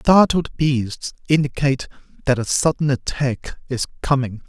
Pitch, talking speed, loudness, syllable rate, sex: 135 Hz, 120 wpm, -20 LUFS, 4.4 syllables/s, male